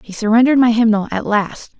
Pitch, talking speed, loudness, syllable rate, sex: 220 Hz, 200 wpm, -14 LUFS, 6.2 syllables/s, female